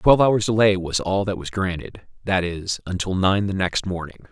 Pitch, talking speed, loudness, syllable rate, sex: 95 Hz, 195 wpm, -21 LUFS, 5.0 syllables/s, male